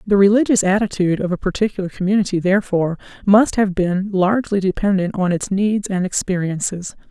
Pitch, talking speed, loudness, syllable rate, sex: 195 Hz, 150 wpm, -18 LUFS, 5.9 syllables/s, female